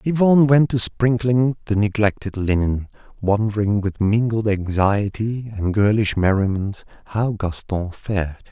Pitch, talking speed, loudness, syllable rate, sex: 105 Hz, 120 wpm, -20 LUFS, 4.4 syllables/s, male